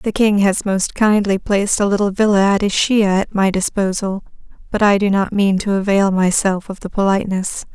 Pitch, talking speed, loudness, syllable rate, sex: 200 Hz, 195 wpm, -16 LUFS, 5.2 syllables/s, female